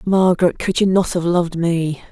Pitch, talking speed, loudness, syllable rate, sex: 175 Hz, 200 wpm, -17 LUFS, 5.1 syllables/s, female